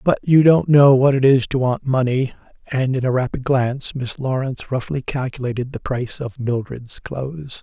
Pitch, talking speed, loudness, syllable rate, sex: 130 Hz, 190 wpm, -19 LUFS, 5.0 syllables/s, male